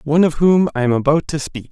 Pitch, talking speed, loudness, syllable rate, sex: 150 Hz, 280 wpm, -16 LUFS, 6.4 syllables/s, male